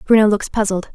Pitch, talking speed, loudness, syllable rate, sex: 205 Hz, 190 wpm, -17 LUFS, 7.1 syllables/s, female